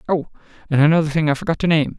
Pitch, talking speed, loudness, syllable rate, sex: 155 Hz, 240 wpm, -18 LUFS, 7.7 syllables/s, male